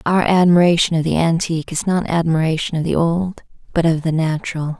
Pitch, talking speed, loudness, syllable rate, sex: 165 Hz, 190 wpm, -17 LUFS, 5.8 syllables/s, female